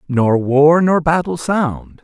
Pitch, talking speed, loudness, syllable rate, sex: 145 Hz, 145 wpm, -15 LUFS, 3.2 syllables/s, male